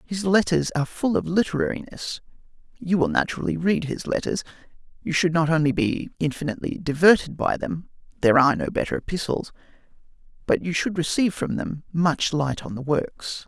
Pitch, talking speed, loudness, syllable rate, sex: 160 Hz, 165 wpm, -23 LUFS, 5.0 syllables/s, male